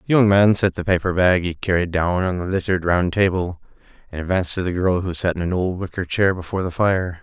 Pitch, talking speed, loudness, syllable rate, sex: 90 Hz, 250 wpm, -20 LUFS, 6.1 syllables/s, male